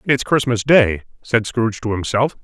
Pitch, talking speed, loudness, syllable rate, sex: 120 Hz, 170 wpm, -17 LUFS, 4.8 syllables/s, male